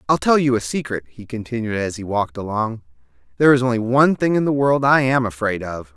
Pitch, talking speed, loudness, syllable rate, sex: 115 Hz, 230 wpm, -19 LUFS, 6.2 syllables/s, male